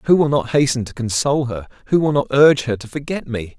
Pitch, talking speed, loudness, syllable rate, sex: 135 Hz, 250 wpm, -18 LUFS, 6.3 syllables/s, male